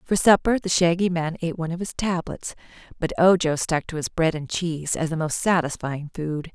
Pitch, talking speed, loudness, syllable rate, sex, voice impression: 165 Hz, 210 wpm, -23 LUFS, 5.5 syllables/s, female, feminine, adult-like, slightly powerful, slightly intellectual